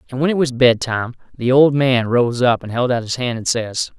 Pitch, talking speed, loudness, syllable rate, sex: 125 Hz, 255 wpm, -17 LUFS, 5.3 syllables/s, male